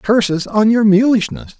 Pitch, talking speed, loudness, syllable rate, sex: 210 Hz, 150 wpm, -13 LUFS, 4.5 syllables/s, male